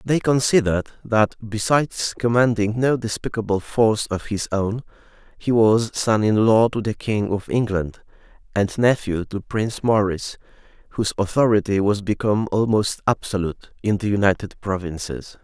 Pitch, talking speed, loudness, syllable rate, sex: 105 Hz, 140 wpm, -21 LUFS, 5.1 syllables/s, male